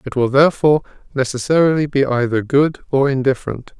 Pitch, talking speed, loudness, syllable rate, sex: 135 Hz, 140 wpm, -16 LUFS, 6.3 syllables/s, male